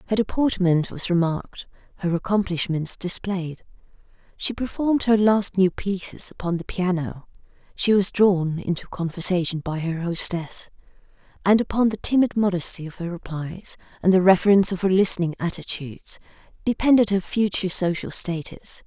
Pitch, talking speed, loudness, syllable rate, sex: 185 Hz, 140 wpm, -22 LUFS, 5.2 syllables/s, female